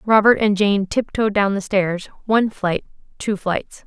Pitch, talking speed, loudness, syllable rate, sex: 205 Hz, 155 wpm, -19 LUFS, 4.3 syllables/s, female